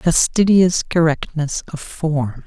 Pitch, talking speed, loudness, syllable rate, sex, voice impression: 160 Hz, 95 wpm, -17 LUFS, 3.4 syllables/s, female, feminine, very adult-like, slightly intellectual, calm, elegant, slightly kind